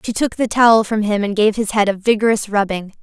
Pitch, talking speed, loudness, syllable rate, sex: 215 Hz, 260 wpm, -16 LUFS, 5.9 syllables/s, female